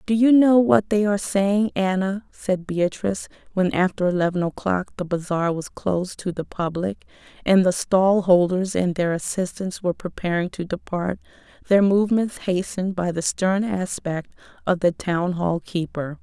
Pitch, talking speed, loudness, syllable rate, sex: 185 Hz, 165 wpm, -22 LUFS, 4.7 syllables/s, female